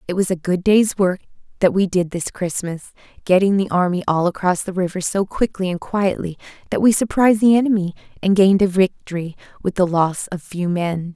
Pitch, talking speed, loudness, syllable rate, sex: 185 Hz, 200 wpm, -19 LUFS, 5.6 syllables/s, female